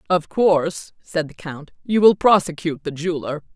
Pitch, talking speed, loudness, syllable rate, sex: 170 Hz, 170 wpm, -19 LUFS, 5.2 syllables/s, female